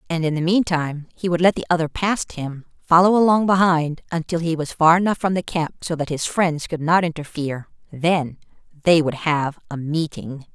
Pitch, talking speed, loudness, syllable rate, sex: 165 Hz, 195 wpm, -20 LUFS, 5.2 syllables/s, female